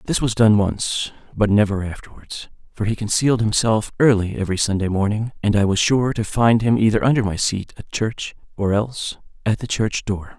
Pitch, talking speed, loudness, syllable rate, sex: 110 Hz, 195 wpm, -20 LUFS, 5.3 syllables/s, male